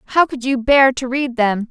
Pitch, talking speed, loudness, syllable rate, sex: 255 Hz, 245 wpm, -16 LUFS, 4.2 syllables/s, female